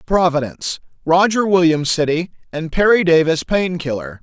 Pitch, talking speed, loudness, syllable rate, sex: 170 Hz, 130 wpm, -16 LUFS, 4.9 syllables/s, male